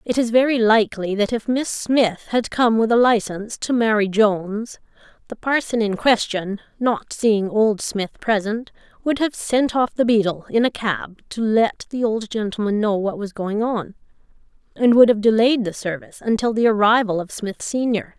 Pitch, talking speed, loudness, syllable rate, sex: 220 Hz, 185 wpm, -20 LUFS, 4.8 syllables/s, female